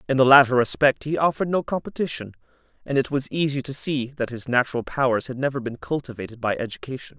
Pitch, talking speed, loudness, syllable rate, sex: 130 Hz, 200 wpm, -22 LUFS, 6.5 syllables/s, male